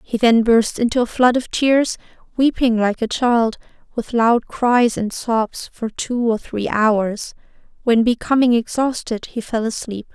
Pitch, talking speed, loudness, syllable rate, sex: 230 Hz, 165 wpm, -18 LUFS, 4.0 syllables/s, female